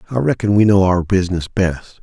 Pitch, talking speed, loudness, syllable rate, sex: 100 Hz, 205 wpm, -16 LUFS, 5.7 syllables/s, male